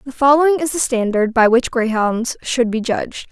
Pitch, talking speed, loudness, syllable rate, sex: 250 Hz, 200 wpm, -16 LUFS, 5.1 syllables/s, female